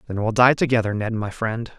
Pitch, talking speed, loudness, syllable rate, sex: 115 Hz, 235 wpm, -20 LUFS, 5.6 syllables/s, male